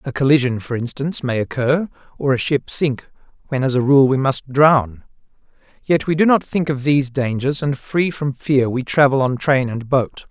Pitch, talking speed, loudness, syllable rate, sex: 135 Hz, 205 wpm, -18 LUFS, 4.9 syllables/s, male